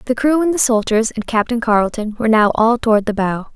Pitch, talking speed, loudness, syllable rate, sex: 225 Hz, 235 wpm, -16 LUFS, 5.9 syllables/s, female